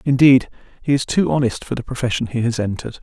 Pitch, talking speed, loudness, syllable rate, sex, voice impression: 125 Hz, 220 wpm, -18 LUFS, 6.5 syllables/s, male, very masculine, very adult-like, slightly muffled, sweet